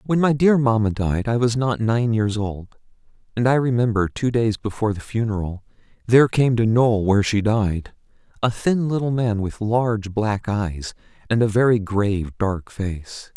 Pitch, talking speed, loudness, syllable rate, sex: 110 Hz, 180 wpm, -20 LUFS, 4.7 syllables/s, male